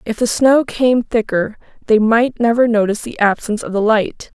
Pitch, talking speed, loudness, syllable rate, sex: 225 Hz, 190 wpm, -15 LUFS, 5.1 syllables/s, female